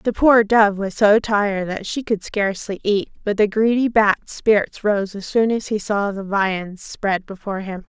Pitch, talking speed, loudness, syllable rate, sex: 205 Hz, 205 wpm, -19 LUFS, 4.4 syllables/s, female